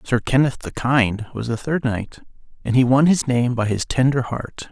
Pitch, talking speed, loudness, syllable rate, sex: 125 Hz, 215 wpm, -20 LUFS, 4.7 syllables/s, male